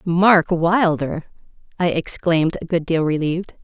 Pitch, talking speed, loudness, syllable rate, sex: 170 Hz, 130 wpm, -19 LUFS, 4.4 syllables/s, female